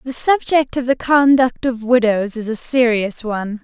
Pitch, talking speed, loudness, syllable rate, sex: 240 Hz, 180 wpm, -16 LUFS, 4.5 syllables/s, female